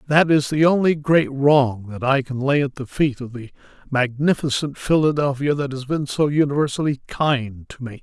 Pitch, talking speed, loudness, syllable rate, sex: 140 Hz, 185 wpm, -20 LUFS, 4.9 syllables/s, male